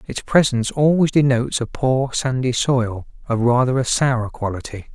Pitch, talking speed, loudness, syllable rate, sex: 125 Hz, 160 wpm, -19 LUFS, 4.8 syllables/s, male